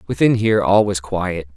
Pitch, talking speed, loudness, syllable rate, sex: 95 Hz, 190 wpm, -17 LUFS, 5.2 syllables/s, male